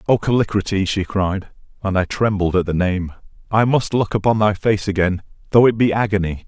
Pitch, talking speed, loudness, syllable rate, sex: 100 Hz, 195 wpm, -18 LUFS, 5.7 syllables/s, male